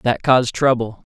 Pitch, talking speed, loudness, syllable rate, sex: 120 Hz, 155 wpm, -17 LUFS, 4.9 syllables/s, male